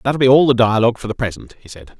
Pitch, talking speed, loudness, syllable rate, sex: 120 Hz, 300 wpm, -15 LUFS, 7.0 syllables/s, male